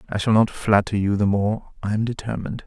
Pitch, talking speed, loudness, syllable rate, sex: 105 Hz, 225 wpm, -22 LUFS, 5.8 syllables/s, male